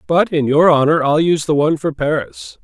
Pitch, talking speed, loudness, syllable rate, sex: 155 Hz, 230 wpm, -15 LUFS, 5.7 syllables/s, male